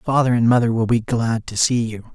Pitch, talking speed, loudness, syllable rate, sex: 115 Hz, 250 wpm, -19 LUFS, 5.4 syllables/s, male